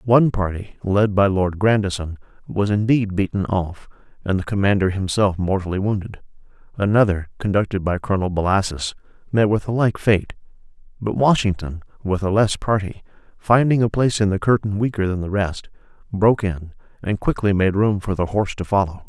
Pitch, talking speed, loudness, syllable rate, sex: 100 Hz, 165 wpm, -20 LUFS, 5.5 syllables/s, male